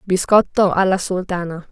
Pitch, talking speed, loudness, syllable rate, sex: 185 Hz, 105 wpm, -17 LUFS, 2.0 syllables/s, female